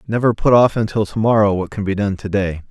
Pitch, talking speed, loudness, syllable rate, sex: 105 Hz, 220 wpm, -17 LUFS, 6.0 syllables/s, male